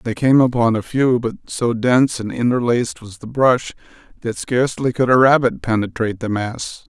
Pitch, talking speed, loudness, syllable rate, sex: 120 Hz, 180 wpm, -18 LUFS, 5.2 syllables/s, male